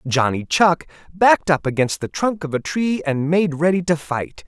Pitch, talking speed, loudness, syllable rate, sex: 165 Hz, 200 wpm, -19 LUFS, 4.6 syllables/s, male